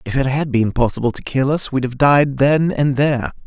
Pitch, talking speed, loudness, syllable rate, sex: 135 Hz, 245 wpm, -17 LUFS, 5.2 syllables/s, male